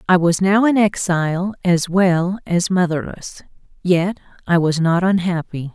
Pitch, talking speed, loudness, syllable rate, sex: 180 Hz, 145 wpm, -17 LUFS, 4.2 syllables/s, female